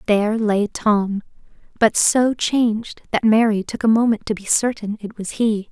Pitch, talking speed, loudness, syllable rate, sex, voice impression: 215 Hz, 180 wpm, -19 LUFS, 4.6 syllables/s, female, feminine, slightly young, slightly adult-like, very thin, very relaxed, very weak, very dark, clear, fluent, slightly raspy, very cute, intellectual, very friendly, very reassuring, very unique, elegant, sweet, very kind, very modest